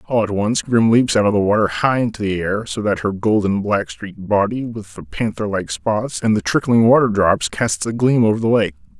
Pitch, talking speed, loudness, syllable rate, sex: 105 Hz, 240 wpm, -17 LUFS, 5.2 syllables/s, male